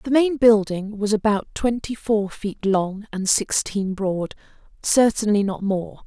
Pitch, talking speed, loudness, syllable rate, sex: 210 Hz, 140 wpm, -21 LUFS, 3.9 syllables/s, female